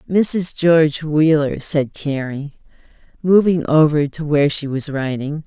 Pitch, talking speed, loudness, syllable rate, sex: 150 Hz, 130 wpm, -17 LUFS, 4.1 syllables/s, female